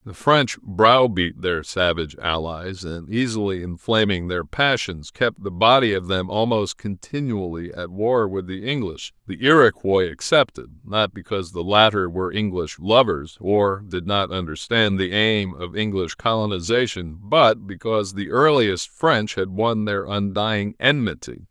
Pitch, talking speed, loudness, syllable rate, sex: 100 Hz, 140 wpm, -20 LUFS, 4.4 syllables/s, male